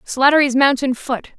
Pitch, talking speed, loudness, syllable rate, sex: 265 Hz, 130 wpm, -16 LUFS, 5.3 syllables/s, female